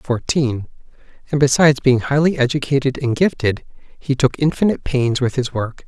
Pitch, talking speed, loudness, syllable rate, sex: 135 Hz, 155 wpm, -18 LUFS, 5.2 syllables/s, male